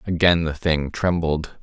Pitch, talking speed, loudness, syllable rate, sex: 80 Hz, 145 wpm, -21 LUFS, 4.1 syllables/s, male